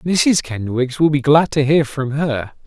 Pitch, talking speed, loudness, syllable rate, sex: 140 Hz, 205 wpm, -17 LUFS, 4.0 syllables/s, male